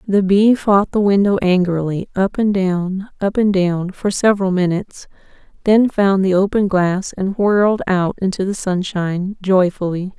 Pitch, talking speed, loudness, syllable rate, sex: 190 Hz, 160 wpm, -16 LUFS, 4.5 syllables/s, female